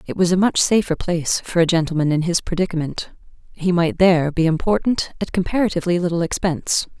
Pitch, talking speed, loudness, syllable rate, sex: 175 Hz, 180 wpm, -19 LUFS, 6.1 syllables/s, female